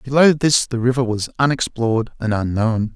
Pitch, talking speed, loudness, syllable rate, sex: 120 Hz, 160 wpm, -18 LUFS, 5.1 syllables/s, male